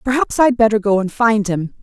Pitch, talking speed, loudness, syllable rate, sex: 215 Hz, 230 wpm, -15 LUFS, 5.4 syllables/s, female